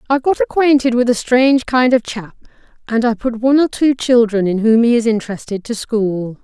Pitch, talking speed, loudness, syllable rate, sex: 240 Hz, 215 wpm, -15 LUFS, 5.6 syllables/s, female